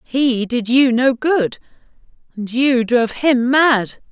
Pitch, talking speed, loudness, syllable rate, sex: 250 Hz, 145 wpm, -16 LUFS, 3.5 syllables/s, female